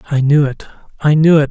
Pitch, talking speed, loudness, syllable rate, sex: 145 Hz, 200 wpm, -13 LUFS, 6.5 syllables/s, male